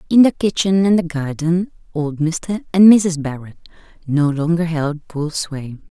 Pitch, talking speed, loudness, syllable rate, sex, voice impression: 165 Hz, 160 wpm, -17 LUFS, 4.2 syllables/s, female, feminine, slightly adult-like, cute, refreshing, friendly, slightly sweet